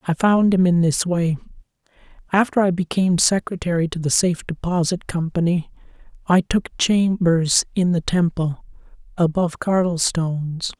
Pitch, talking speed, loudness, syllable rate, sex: 175 Hz, 130 wpm, -20 LUFS, 4.9 syllables/s, male